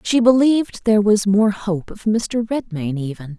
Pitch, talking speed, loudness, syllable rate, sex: 205 Hz, 175 wpm, -18 LUFS, 4.6 syllables/s, female